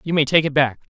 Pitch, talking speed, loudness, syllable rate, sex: 145 Hz, 305 wpm, -18 LUFS, 6.9 syllables/s, male